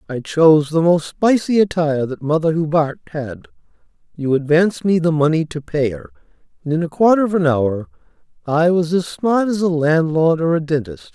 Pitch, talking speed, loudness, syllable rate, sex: 165 Hz, 180 wpm, -17 LUFS, 5.3 syllables/s, male